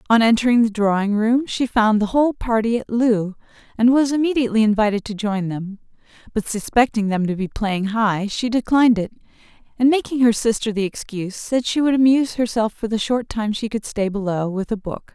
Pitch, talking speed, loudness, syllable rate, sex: 225 Hz, 200 wpm, -19 LUFS, 5.6 syllables/s, female